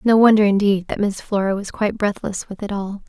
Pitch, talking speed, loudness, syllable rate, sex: 205 Hz, 235 wpm, -19 LUFS, 5.7 syllables/s, female